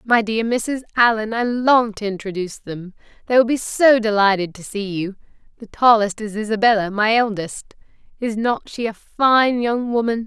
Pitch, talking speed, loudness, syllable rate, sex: 220 Hz, 175 wpm, -18 LUFS, 4.8 syllables/s, female